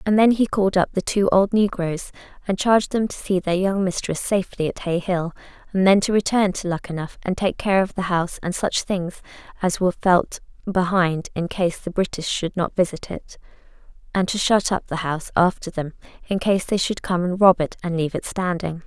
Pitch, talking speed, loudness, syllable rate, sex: 185 Hz, 215 wpm, -21 LUFS, 5.4 syllables/s, female